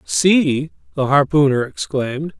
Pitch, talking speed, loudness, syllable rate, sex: 145 Hz, 100 wpm, -17 LUFS, 4.0 syllables/s, male